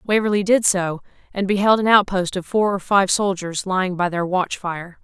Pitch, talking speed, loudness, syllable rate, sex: 190 Hz, 205 wpm, -19 LUFS, 5.0 syllables/s, female